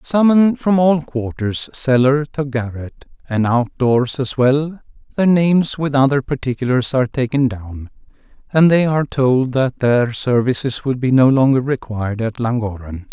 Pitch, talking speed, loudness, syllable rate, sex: 130 Hz, 155 wpm, -16 LUFS, 4.6 syllables/s, male